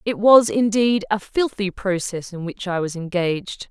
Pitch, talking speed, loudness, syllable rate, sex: 200 Hz, 180 wpm, -20 LUFS, 4.5 syllables/s, female